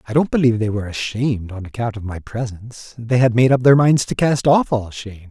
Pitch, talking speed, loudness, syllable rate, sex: 120 Hz, 250 wpm, -18 LUFS, 6.2 syllables/s, male